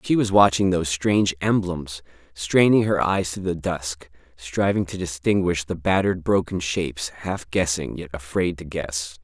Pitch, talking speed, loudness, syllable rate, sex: 85 Hz, 160 wpm, -22 LUFS, 4.6 syllables/s, male